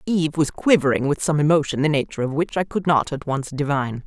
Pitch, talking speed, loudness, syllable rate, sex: 150 Hz, 235 wpm, -21 LUFS, 6.4 syllables/s, female